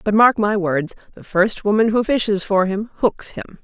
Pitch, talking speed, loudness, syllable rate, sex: 205 Hz, 215 wpm, -18 LUFS, 4.9 syllables/s, female